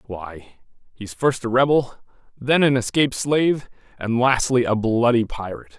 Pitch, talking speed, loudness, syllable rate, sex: 120 Hz, 145 wpm, -20 LUFS, 4.8 syllables/s, male